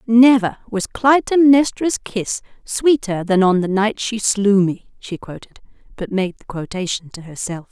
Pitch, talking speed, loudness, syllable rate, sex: 210 Hz, 155 wpm, -17 LUFS, 4.3 syllables/s, female